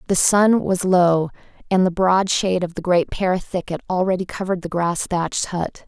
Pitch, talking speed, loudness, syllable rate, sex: 180 Hz, 195 wpm, -20 LUFS, 5.0 syllables/s, female